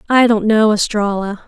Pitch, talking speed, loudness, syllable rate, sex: 215 Hz, 165 wpm, -14 LUFS, 4.8 syllables/s, female